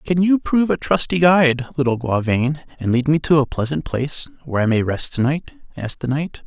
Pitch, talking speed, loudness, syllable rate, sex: 145 Hz, 230 wpm, -19 LUFS, 6.1 syllables/s, male